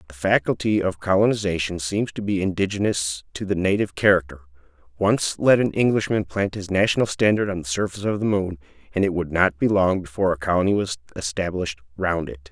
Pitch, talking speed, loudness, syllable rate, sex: 95 Hz, 185 wpm, -22 LUFS, 6.0 syllables/s, male